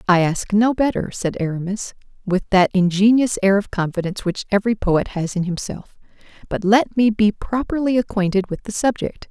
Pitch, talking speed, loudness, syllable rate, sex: 205 Hz, 175 wpm, -19 LUFS, 5.3 syllables/s, female